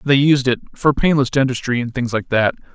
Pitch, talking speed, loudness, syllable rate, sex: 130 Hz, 195 wpm, -17 LUFS, 5.7 syllables/s, male